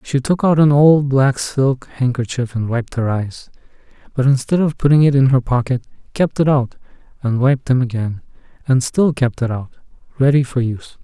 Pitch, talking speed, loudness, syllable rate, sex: 130 Hz, 190 wpm, -16 LUFS, 4.9 syllables/s, male